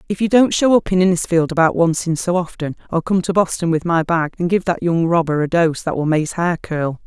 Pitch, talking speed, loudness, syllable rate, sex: 170 Hz, 270 wpm, -17 LUFS, 5.7 syllables/s, female